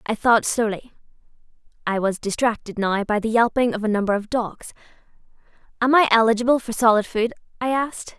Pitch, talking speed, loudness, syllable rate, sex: 225 Hz, 170 wpm, -21 LUFS, 3.5 syllables/s, female